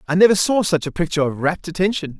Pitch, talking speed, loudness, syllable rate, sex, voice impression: 170 Hz, 245 wpm, -18 LUFS, 6.9 syllables/s, male, very masculine, slightly middle-aged, thick, tensed, very powerful, bright, slightly soft, very clear, fluent, raspy, cool, slightly intellectual, refreshing, sincere, slightly calm, slightly mature, friendly, slightly reassuring, unique, slightly elegant, wild, slightly sweet, very lively, slightly kind, intense